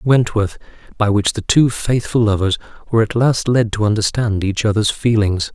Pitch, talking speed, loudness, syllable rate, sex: 110 Hz, 175 wpm, -17 LUFS, 5.0 syllables/s, male